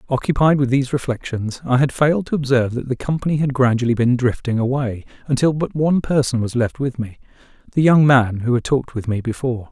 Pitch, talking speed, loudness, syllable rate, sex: 130 Hz, 205 wpm, -19 LUFS, 6.2 syllables/s, male